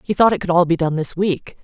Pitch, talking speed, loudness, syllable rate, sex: 175 Hz, 330 wpm, -18 LUFS, 6.0 syllables/s, female